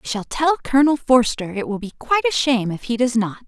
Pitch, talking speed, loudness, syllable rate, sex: 245 Hz, 260 wpm, -19 LUFS, 6.4 syllables/s, female